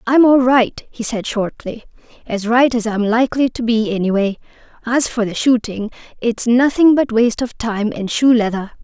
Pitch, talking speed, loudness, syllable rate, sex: 235 Hz, 175 wpm, -16 LUFS, 4.9 syllables/s, female